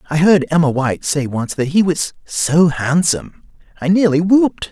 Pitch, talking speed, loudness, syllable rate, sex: 160 Hz, 180 wpm, -15 LUFS, 5.0 syllables/s, male